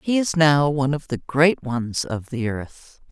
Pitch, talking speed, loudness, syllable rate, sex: 145 Hz, 210 wpm, -21 LUFS, 4.1 syllables/s, female